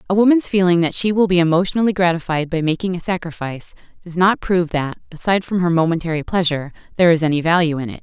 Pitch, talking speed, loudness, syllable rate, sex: 175 Hz, 210 wpm, -18 LUFS, 7.1 syllables/s, female